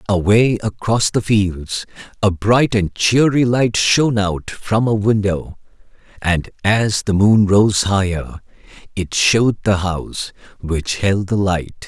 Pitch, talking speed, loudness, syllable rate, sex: 100 Hz, 140 wpm, -17 LUFS, 3.7 syllables/s, male